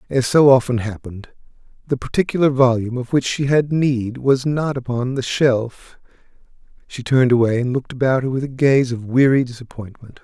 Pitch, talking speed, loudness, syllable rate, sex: 130 Hz, 175 wpm, -18 LUFS, 5.5 syllables/s, male